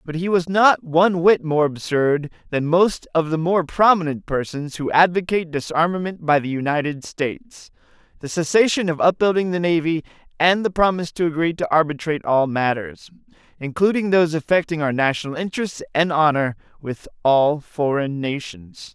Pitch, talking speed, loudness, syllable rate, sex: 160 Hz, 160 wpm, -20 LUFS, 5.2 syllables/s, male